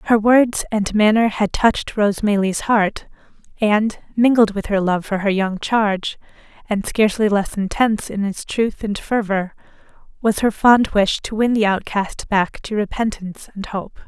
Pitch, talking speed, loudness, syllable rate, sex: 210 Hz, 170 wpm, -18 LUFS, 4.5 syllables/s, female